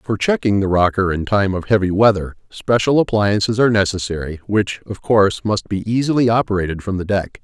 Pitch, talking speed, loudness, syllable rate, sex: 100 Hz, 185 wpm, -17 LUFS, 5.6 syllables/s, male